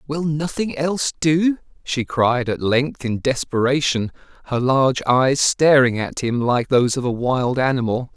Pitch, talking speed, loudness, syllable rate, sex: 135 Hz, 160 wpm, -19 LUFS, 4.4 syllables/s, male